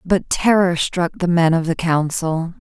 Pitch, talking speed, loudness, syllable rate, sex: 170 Hz, 180 wpm, -18 LUFS, 4.1 syllables/s, female